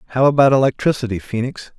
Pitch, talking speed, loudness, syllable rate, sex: 125 Hz, 135 wpm, -17 LUFS, 6.8 syllables/s, male